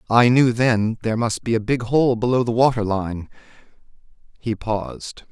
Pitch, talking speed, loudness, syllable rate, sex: 115 Hz, 170 wpm, -20 LUFS, 4.8 syllables/s, male